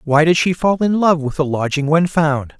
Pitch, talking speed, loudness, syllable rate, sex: 160 Hz, 255 wpm, -16 LUFS, 4.9 syllables/s, male